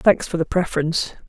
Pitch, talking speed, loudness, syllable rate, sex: 165 Hz, 190 wpm, -21 LUFS, 6.3 syllables/s, female